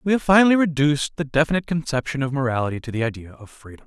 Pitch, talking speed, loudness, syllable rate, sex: 145 Hz, 215 wpm, -20 LUFS, 7.3 syllables/s, male